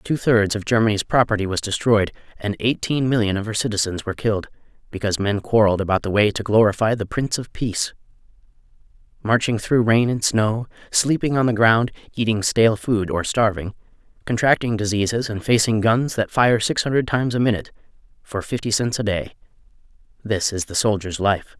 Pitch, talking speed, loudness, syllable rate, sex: 110 Hz, 170 wpm, -20 LUFS, 5.7 syllables/s, male